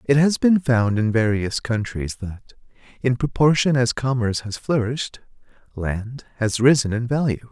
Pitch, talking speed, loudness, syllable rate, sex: 120 Hz, 150 wpm, -21 LUFS, 4.6 syllables/s, male